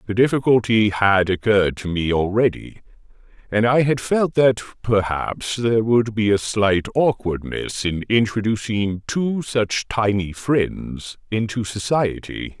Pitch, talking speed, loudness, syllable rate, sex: 110 Hz, 130 wpm, -20 LUFS, 4.0 syllables/s, male